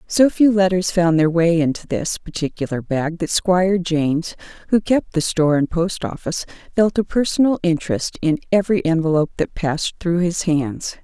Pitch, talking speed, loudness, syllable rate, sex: 175 Hz, 175 wpm, -19 LUFS, 5.3 syllables/s, female